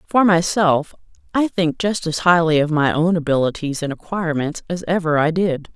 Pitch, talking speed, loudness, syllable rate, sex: 165 Hz, 175 wpm, -19 LUFS, 5.1 syllables/s, female